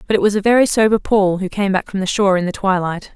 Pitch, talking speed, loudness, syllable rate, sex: 195 Hz, 305 wpm, -16 LUFS, 6.7 syllables/s, female